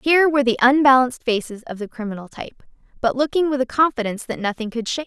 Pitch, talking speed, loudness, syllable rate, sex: 250 Hz, 215 wpm, -19 LUFS, 7.1 syllables/s, female